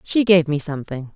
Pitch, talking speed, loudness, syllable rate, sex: 160 Hz, 205 wpm, -18 LUFS, 5.8 syllables/s, female